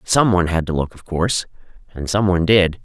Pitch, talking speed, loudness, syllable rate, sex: 90 Hz, 190 wpm, -18 LUFS, 6.2 syllables/s, male